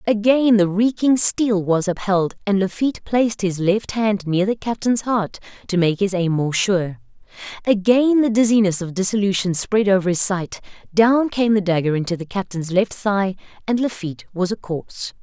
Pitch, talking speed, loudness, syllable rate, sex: 200 Hz, 175 wpm, -19 LUFS, 4.9 syllables/s, female